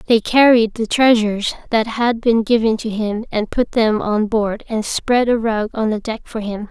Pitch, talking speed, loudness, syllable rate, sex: 225 Hz, 215 wpm, -17 LUFS, 4.5 syllables/s, female